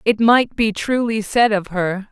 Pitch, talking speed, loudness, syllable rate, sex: 215 Hz, 200 wpm, -17 LUFS, 4.0 syllables/s, female